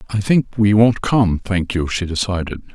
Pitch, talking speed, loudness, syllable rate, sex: 100 Hz, 195 wpm, -17 LUFS, 4.9 syllables/s, male